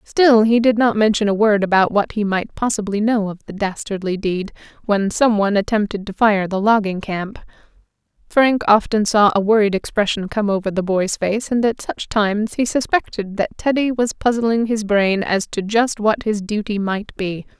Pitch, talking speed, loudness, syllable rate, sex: 210 Hz, 195 wpm, -18 LUFS, 4.9 syllables/s, female